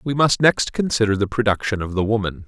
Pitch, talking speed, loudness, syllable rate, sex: 110 Hz, 220 wpm, -19 LUFS, 5.9 syllables/s, male